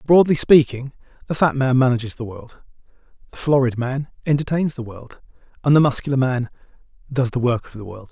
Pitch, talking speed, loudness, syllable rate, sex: 130 Hz, 180 wpm, -19 LUFS, 5.7 syllables/s, male